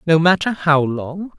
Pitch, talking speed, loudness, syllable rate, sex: 165 Hz, 175 wpm, -17 LUFS, 4.1 syllables/s, male